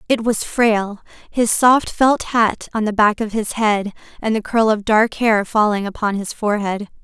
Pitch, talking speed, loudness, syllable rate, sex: 215 Hz, 195 wpm, -17 LUFS, 4.6 syllables/s, female